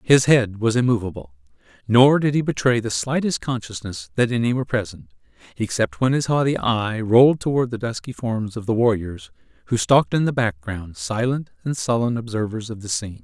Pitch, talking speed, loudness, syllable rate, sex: 115 Hz, 180 wpm, -21 LUFS, 5.4 syllables/s, male